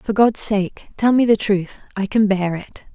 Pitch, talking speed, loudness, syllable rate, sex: 205 Hz, 225 wpm, -18 LUFS, 4.4 syllables/s, female